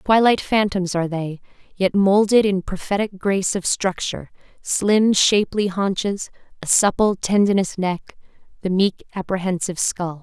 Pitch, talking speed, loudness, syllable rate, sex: 195 Hz, 130 wpm, -20 LUFS, 4.9 syllables/s, female